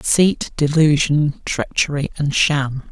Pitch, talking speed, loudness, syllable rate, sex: 145 Hz, 105 wpm, -18 LUFS, 3.7 syllables/s, male